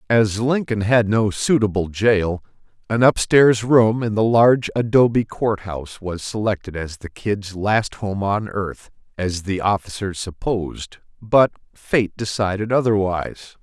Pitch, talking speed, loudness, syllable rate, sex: 105 Hz, 135 wpm, -19 LUFS, 4.3 syllables/s, male